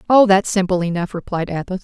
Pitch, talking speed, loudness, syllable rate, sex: 190 Hz, 195 wpm, -18 LUFS, 6.1 syllables/s, female